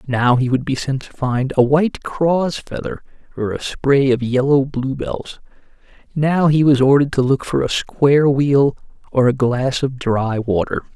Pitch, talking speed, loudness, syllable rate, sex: 135 Hz, 180 wpm, -17 LUFS, 4.4 syllables/s, male